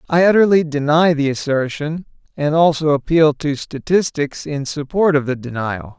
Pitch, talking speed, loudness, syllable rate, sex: 150 Hz, 150 wpm, -17 LUFS, 4.7 syllables/s, male